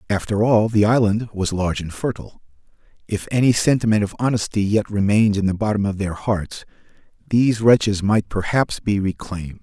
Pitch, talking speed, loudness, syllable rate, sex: 105 Hz, 170 wpm, -19 LUFS, 5.6 syllables/s, male